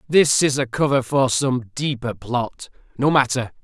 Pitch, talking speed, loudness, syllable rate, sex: 130 Hz, 165 wpm, -20 LUFS, 4.2 syllables/s, male